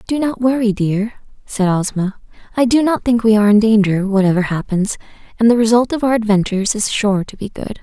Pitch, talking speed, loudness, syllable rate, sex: 215 Hz, 205 wpm, -16 LUFS, 5.7 syllables/s, female